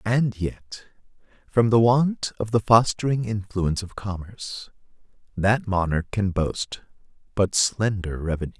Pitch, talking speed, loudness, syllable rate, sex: 105 Hz, 125 wpm, -23 LUFS, 4.3 syllables/s, male